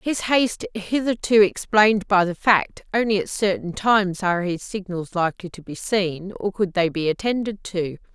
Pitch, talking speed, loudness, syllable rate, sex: 195 Hz, 175 wpm, -21 LUFS, 4.9 syllables/s, female